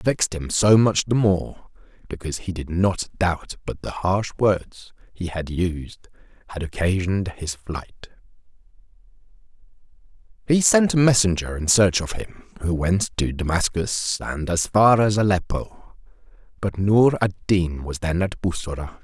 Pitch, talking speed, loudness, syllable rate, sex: 95 Hz, 150 wpm, -21 LUFS, 4.3 syllables/s, male